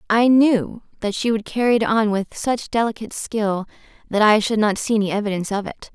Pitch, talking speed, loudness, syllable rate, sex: 215 Hz, 210 wpm, -20 LUFS, 5.7 syllables/s, female